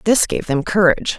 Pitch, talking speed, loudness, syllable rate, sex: 185 Hz, 200 wpm, -16 LUFS, 5.6 syllables/s, female